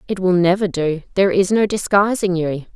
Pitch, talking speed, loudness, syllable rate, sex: 185 Hz, 195 wpm, -17 LUFS, 5.4 syllables/s, female